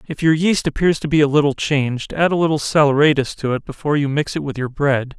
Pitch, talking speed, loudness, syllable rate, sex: 145 Hz, 255 wpm, -18 LUFS, 6.1 syllables/s, male